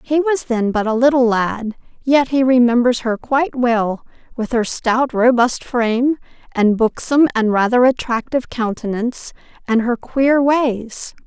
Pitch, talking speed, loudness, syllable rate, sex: 245 Hz, 150 wpm, -17 LUFS, 4.3 syllables/s, female